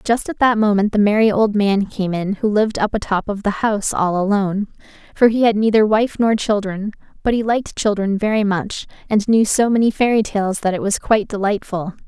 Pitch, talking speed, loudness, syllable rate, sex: 210 Hz, 215 wpm, -17 LUFS, 5.5 syllables/s, female